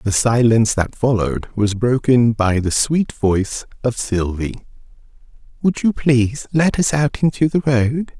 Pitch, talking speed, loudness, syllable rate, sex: 120 Hz, 155 wpm, -17 LUFS, 4.4 syllables/s, male